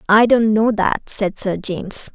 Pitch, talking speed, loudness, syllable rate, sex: 210 Hz, 195 wpm, -17 LUFS, 4.1 syllables/s, female